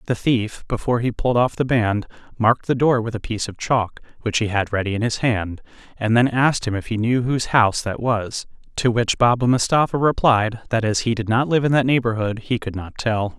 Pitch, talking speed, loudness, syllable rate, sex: 115 Hz, 235 wpm, -20 LUFS, 5.7 syllables/s, male